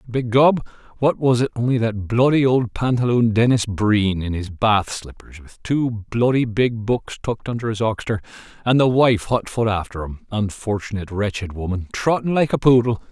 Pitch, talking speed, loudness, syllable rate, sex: 115 Hz, 170 wpm, -20 LUFS, 5.0 syllables/s, male